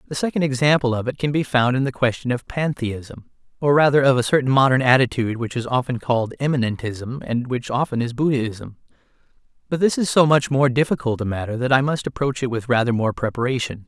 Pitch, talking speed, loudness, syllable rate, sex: 130 Hz, 205 wpm, -20 LUFS, 6.0 syllables/s, male